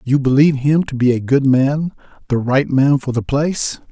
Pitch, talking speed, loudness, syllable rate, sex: 135 Hz, 200 wpm, -16 LUFS, 5.0 syllables/s, male